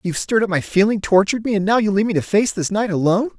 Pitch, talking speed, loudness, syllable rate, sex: 200 Hz, 300 wpm, -18 LUFS, 7.7 syllables/s, male